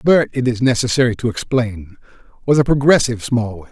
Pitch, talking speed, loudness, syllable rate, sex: 120 Hz, 160 wpm, -16 LUFS, 5.9 syllables/s, male